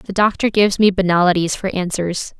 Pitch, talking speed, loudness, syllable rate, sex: 190 Hz, 175 wpm, -17 LUFS, 5.6 syllables/s, female